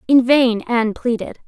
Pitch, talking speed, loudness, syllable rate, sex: 245 Hz, 165 wpm, -17 LUFS, 5.1 syllables/s, female